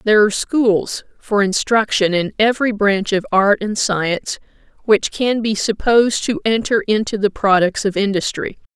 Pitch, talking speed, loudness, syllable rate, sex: 210 Hz, 160 wpm, -17 LUFS, 4.8 syllables/s, female